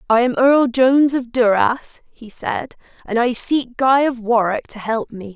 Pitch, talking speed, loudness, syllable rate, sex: 240 Hz, 190 wpm, -17 LUFS, 4.2 syllables/s, female